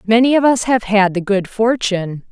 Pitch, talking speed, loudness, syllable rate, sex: 215 Hz, 210 wpm, -15 LUFS, 5.0 syllables/s, female